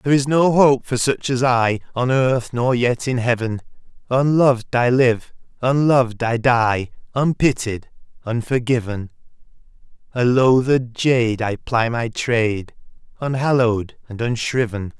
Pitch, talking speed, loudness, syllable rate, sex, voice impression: 120 Hz, 130 wpm, -19 LUFS, 4.2 syllables/s, male, very masculine, adult-like, thick, very tensed, powerful, bright, soft, very clear, fluent, slightly raspy, cool, intellectual, very refreshing, sincere, very calm, mature, very friendly, very reassuring, very unique, very elegant, wild, sweet, lively, very kind, slightly modest